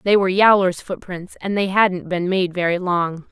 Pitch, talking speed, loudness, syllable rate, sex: 185 Hz, 200 wpm, -19 LUFS, 4.7 syllables/s, female